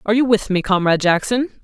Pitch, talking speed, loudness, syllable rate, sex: 210 Hz, 220 wpm, -17 LUFS, 7.1 syllables/s, female